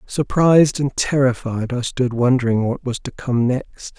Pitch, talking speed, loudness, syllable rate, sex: 130 Hz, 165 wpm, -18 LUFS, 4.4 syllables/s, male